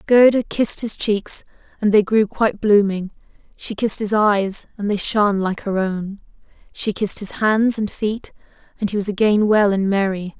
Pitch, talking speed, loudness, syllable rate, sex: 205 Hz, 185 wpm, -19 LUFS, 4.9 syllables/s, female